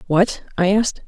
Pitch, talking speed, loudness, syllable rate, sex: 195 Hz, 165 wpm, -19 LUFS, 5.2 syllables/s, female